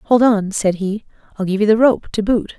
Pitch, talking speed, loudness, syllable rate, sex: 210 Hz, 255 wpm, -17 LUFS, 4.9 syllables/s, female